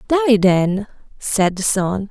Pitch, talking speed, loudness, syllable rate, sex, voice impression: 210 Hz, 140 wpm, -17 LUFS, 3.7 syllables/s, female, feminine, slightly young, relaxed, powerful, bright, slightly soft, raspy, slightly cute, calm, friendly, reassuring, kind, modest